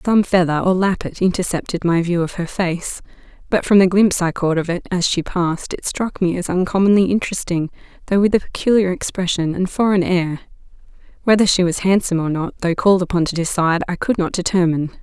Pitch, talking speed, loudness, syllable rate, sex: 180 Hz, 195 wpm, -18 LUFS, 6.0 syllables/s, female